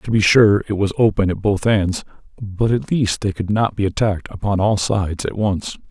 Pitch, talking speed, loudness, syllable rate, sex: 100 Hz, 225 wpm, -18 LUFS, 5.1 syllables/s, male